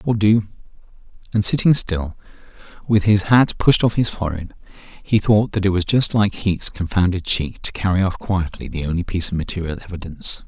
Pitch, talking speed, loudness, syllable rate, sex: 95 Hz, 190 wpm, -19 LUFS, 5.6 syllables/s, male